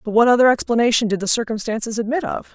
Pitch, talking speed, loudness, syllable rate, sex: 230 Hz, 210 wpm, -18 LUFS, 6.9 syllables/s, female